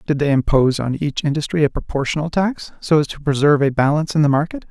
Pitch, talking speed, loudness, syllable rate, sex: 150 Hz, 230 wpm, -18 LUFS, 6.7 syllables/s, male